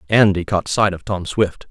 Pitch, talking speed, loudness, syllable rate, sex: 95 Hz, 210 wpm, -18 LUFS, 4.6 syllables/s, male